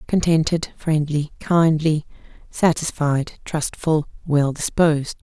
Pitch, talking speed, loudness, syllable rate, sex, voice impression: 155 Hz, 80 wpm, -20 LUFS, 3.8 syllables/s, female, feminine, adult-like, slightly relaxed, powerful, slightly soft, slightly raspy, intellectual, calm, friendly, reassuring, kind, slightly modest